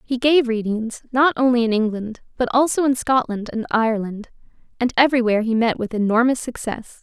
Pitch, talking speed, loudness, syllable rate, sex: 235 Hz, 170 wpm, -20 LUFS, 5.6 syllables/s, female